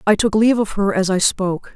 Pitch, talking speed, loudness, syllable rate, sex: 205 Hz, 275 wpm, -17 LUFS, 6.1 syllables/s, female